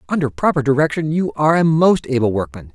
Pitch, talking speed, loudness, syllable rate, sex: 140 Hz, 195 wpm, -17 LUFS, 6.3 syllables/s, male